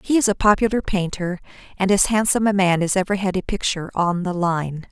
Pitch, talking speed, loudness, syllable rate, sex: 190 Hz, 220 wpm, -20 LUFS, 5.9 syllables/s, female